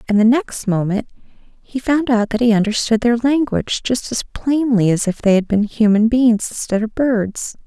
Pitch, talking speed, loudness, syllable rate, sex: 230 Hz, 195 wpm, -17 LUFS, 4.6 syllables/s, female